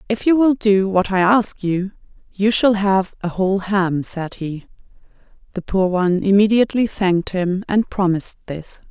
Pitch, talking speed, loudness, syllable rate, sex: 195 Hz, 170 wpm, -18 LUFS, 4.8 syllables/s, female